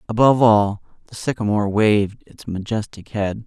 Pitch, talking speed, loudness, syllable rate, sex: 105 Hz, 140 wpm, -19 LUFS, 5.4 syllables/s, male